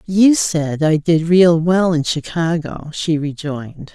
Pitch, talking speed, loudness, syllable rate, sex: 165 Hz, 150 wpm, -16 LUFS, 3.7 syllables/s, female